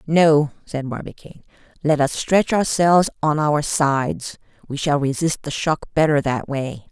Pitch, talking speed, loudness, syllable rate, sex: 150 Hz, 155 wpm, -20 LUFS, 4.6 syllables/s, female